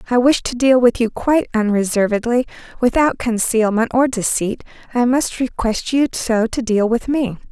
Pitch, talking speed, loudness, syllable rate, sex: 235 Hz, 170 wpm, -17 LUFS, 4.9 syllables/s, female